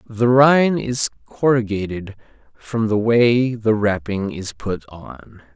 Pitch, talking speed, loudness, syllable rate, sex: 110 Hz, 130 wpm, -18 LUFS, 3.3 syllables/s, male